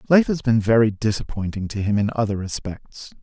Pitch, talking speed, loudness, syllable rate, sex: 110 Hz, 185 wpm, -21 LUFS, 5.4 syllables/s, male